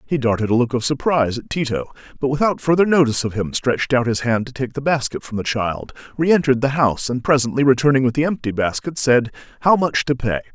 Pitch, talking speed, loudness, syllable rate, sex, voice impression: 130 Hz, 230 wpm, -19 LUFS, 6.4 syllables/s, male, masculine, slightly old, thick, very tensed, powerful, very bright, soft, very clear, very fluent, very cool, intellectual, very refreshing, very sincere, very calm, very mature, friendly, reassuring, very unique, elegant, very wild, very sweet, lively, kind, intense